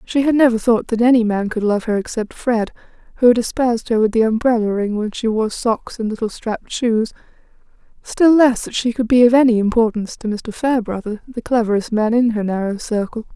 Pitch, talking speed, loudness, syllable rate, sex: 225 Hz, 210 wpm, -17 LUFS, 5.7 syllables/s, female